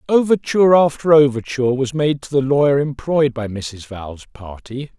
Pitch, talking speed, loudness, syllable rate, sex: 135 Hz, 155 wpm, -16 LUFS, 4.9 syllables/s, male